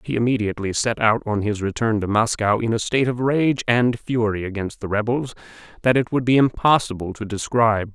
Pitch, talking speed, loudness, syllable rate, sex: 115 Hz, 195 wpm, -21 LUFS, 5.6 syllables/s, male